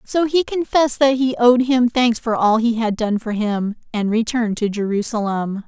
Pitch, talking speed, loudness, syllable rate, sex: 230 Hz, 200 wpm, -18 LUFS, 4.8 syllables/s, female